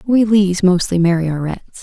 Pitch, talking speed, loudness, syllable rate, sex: 185 Hz, 165 wpm, -15 LUFS, 5.8 syllables/s, female